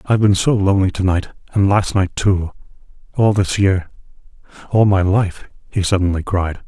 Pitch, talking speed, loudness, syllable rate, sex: 95 Hz, 145 wpm, -17 LUFS, 5.2 syllables/s, male